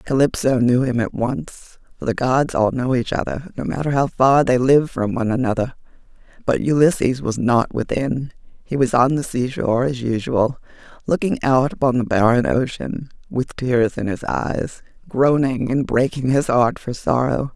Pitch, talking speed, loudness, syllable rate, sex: 130 Hz, 170 wpm, -19 LUFS, 4.7 syllables/s, female